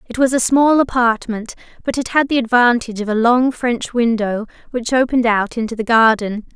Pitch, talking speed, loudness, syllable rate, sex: 235 Hz, 190 wpm, -16 LUFS, 5.3 syllables/s, female